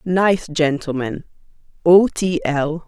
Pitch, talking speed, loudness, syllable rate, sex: 165 Hz, 85 wpm, -18 LUFS, 3.3 syllables/s, female